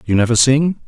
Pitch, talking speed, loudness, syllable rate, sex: 125 Hz, 205 wpm, -14 LUFS, 5.7 syllables/s, male